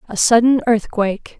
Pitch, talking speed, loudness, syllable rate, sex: 225 Hz, 130 wpm, -16 LUFS, 5.1 syllables/s, female